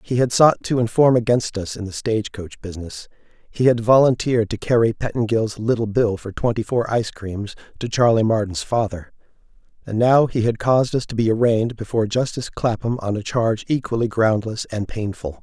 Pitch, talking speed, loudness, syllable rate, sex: 110 Hz, 180 wpm, -20 LUFS, 5.6 syllables/s, male